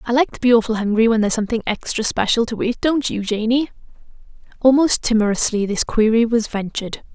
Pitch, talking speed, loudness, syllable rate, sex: 230 Hz, 185 wpm, -18 LUFS, 6.2 syllables/s, female